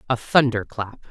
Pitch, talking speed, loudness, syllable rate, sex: 120 Hz, 165 wpm, -21 LUFS, 4.9 syllables/s, female